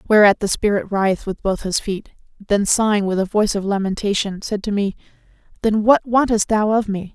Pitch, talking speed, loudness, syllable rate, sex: 205 Hz, 200 wpm, -19 LUFS, 5.6 syllables/s, female